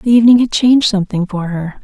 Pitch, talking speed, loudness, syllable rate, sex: 210 Hz, 230 wpm, -12 LUFS, 6.9 syllables/s, female